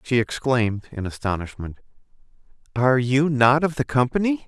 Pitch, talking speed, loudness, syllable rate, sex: 130 Hz, 135 wpm, -22 LUFS, 5.3 syllables/s, male